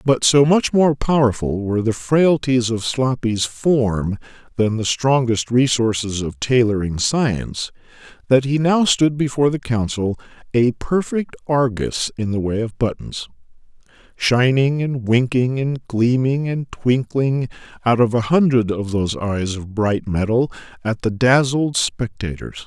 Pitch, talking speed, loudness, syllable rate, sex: 125 Hz, 145 wpm, -19 LUFS, 4.2 syllables/s, male